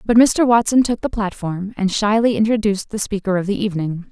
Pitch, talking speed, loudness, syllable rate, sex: 210 Hz, 205 wpm, -18 LUFS, 5.8 syllables/s, female